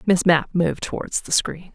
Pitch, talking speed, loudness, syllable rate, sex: 170 Hz, 205 wpm, -21 LUFS, 5.0 syllables/s, female